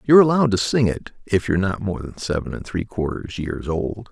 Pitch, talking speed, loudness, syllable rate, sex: 100 Hz, 260 wpm, -22 LUFS, 6.2 syllables/s, male